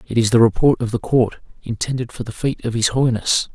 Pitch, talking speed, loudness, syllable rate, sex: 120 Hz, 235 wpm, -18 LUFS, 6.0 syllables/s, male